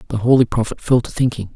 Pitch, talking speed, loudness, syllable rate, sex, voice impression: 120 Hz, 230 wpm, -17 LUFS, 6.8 syllables/s, male, masculine, adult-like, slightly thick, slightly halting, slightly sincere, calm